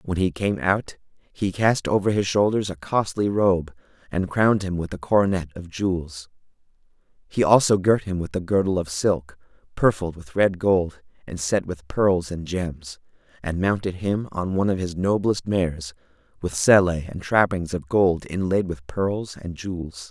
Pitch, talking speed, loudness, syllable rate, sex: 90 Hz, 175 wpm, -23 LUFS, 4.6 syllables/s, male